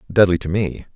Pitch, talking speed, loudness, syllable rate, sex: 90 Hz, 190 wpm, -19 LUFS, 5.6 syllables/s, male